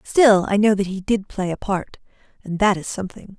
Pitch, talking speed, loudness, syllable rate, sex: 200 Hz, 230 wpm, -20 LUFS, 5.2 syllables/s, female